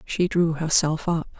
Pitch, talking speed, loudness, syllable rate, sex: 165 Hz, 170 wpm, -22 LUFS, 4.1 syllables/s, female